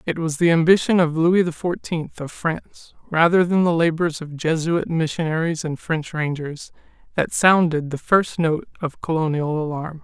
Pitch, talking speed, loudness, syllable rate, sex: 160 Hz, 165 wpm, -20 LUFS, 4.7 syllables/s, male